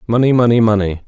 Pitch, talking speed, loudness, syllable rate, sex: 110 Hz, 165 wpm, -13 LUFS, 6.5 syllables/s, male